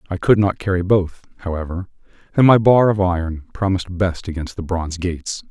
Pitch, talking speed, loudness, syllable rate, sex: 90 Hz, 185 wpm, -18 LUFS, 5.6 syllables/s, male